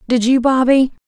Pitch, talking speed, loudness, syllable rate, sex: 255 Hz, 165 wpm, -14 LUFS, 5.0 syllables/s, female